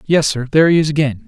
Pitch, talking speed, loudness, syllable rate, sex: 145 Hz, 235 wpm, -14 LUFS, 7.4 syllables/s, male